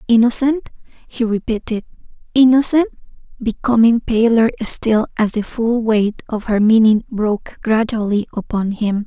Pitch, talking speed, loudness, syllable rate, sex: 225 Hz, 120 wpm, -16 LUFS, 4.6 syllables/s, female